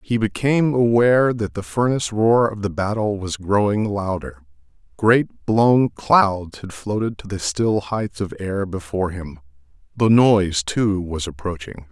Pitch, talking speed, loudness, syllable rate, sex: 100 Hz, 155 wpm, -20 LUFS, 4.4 syllables/s, male